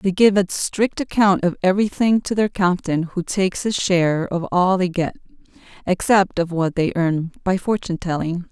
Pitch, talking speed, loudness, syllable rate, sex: 185 Hz, 185 wpm, -19 LUFS, 4.9 syllables/s, female